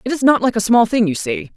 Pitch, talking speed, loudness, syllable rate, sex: 220 Hz, 345 wpm, -16 LUFS, 6.3 syllables/s, female